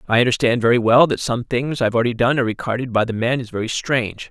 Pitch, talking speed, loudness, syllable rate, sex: 120 Hz, 265 wpm, -18 LUFS, 7.0 syllables/s, male